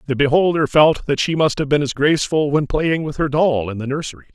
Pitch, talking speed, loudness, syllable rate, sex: 145 Hz, 250 wpm, -17 LUFS, 5.9 syllables/s, male